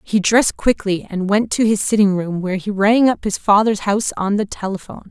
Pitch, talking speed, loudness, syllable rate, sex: 205 Hz, 225 wpm, -17 LUFS, 5.6 syllables/s, female